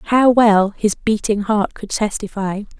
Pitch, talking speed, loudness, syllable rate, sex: 210 Hz, 150 wpm, -17 LUFS, 3.8 syllables/s, female